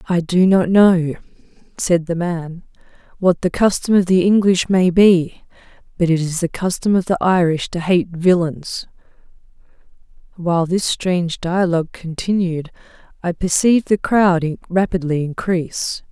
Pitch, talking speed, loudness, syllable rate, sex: 175 Hz, 140 wpm, -17 LUFS, 4.5 syllables/s, female